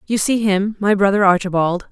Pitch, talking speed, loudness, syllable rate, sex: 200 Hz, 155 wpm, -16 LUFS, 5.2 syllables/s, female